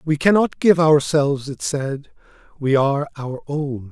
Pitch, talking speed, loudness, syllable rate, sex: 145 Hz, 155 wpm, -19 LUFS, 4.4 syllables/s, male